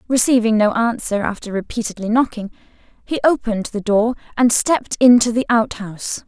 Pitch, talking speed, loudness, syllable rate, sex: 225 Hz, 145 wpm, -17 LUFS, 5.5 syllables/s, female